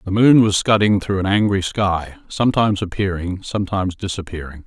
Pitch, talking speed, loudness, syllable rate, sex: 95 Hz, 155 wpm, -18 LUFS, 5.6 syllables/s, male